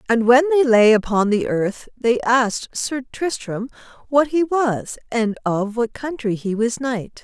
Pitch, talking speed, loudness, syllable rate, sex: 240 Hz, 175 wpm, -19 LUFS, 4.1 syllables/s, female